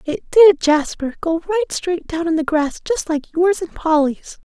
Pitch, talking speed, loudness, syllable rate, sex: 335 Hz, 200 wpm, -18 LUFS, 4.7 syllables/s, female